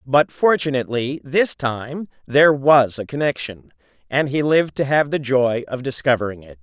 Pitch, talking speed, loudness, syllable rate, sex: 135 Hz, 165 wpm, -19 LUFS, 4.9 syllables/s, male